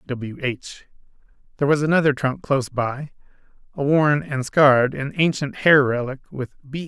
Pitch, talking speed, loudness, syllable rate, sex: 140 Hz, 150 wpm, -20 LUFS, 4.8 syllables/s, male